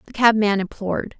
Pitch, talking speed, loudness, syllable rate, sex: 210 Hz, 150 wpm, -20 LUFS, 5.7 syllables/s, female